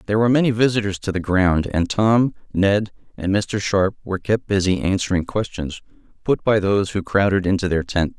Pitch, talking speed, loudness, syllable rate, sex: 100 Hz, 190 wpm, -20 LUFS, 5.5 syllables/s, male